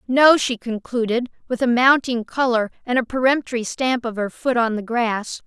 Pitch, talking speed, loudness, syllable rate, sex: 240 Hz, 185 wpm, -20 LUFS, 4.8 syllables/s, female